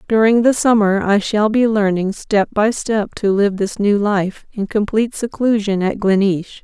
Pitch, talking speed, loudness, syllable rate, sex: 210 Hz, 180 wpm, -16 LUFS, 4.4 syllables/s, female